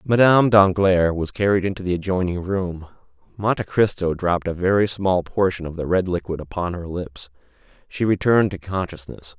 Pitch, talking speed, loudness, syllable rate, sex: 90 Hz, 165 wpm, -20 LUFS, 5.4 syllables/s, male